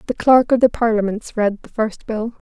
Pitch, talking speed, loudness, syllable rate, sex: 225 Hz, 220 wpm, -18 LUFS, 5.1 syllables/s, female